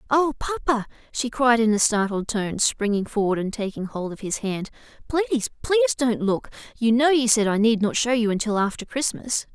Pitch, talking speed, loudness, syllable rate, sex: 230 Hz, 200 wpm, -23 LUFS, 5.4 syllables/s, female